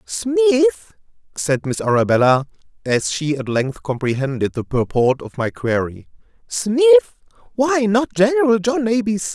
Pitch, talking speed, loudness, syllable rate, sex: 185 Hz, 135 wpm, -18 LUFS, 4.8 syllables/s, male